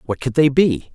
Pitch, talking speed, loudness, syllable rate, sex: 135 Hz, 255 wpm, -17 LUFS, 4.9 syllables/s, male